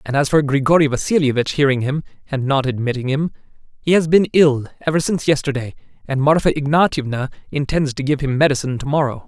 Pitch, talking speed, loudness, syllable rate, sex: 140 Hz, 180 wpm, -18 LUFS, 6.3 syllables/s, male